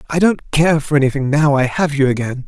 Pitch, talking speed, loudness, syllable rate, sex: 145 Hz, 240 wpm, -15 LUFS, 5.7 syllables/s, male